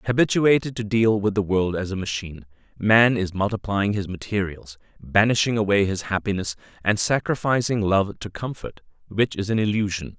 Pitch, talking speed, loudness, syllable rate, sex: 105 Hz, 160 wpm, -22 LUFS, 5.3 syllables/s, male